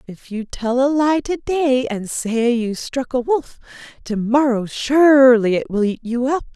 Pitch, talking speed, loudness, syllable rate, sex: 250 Hz, 190 wpm, -18 LUFS, 4.1 syllables/s, female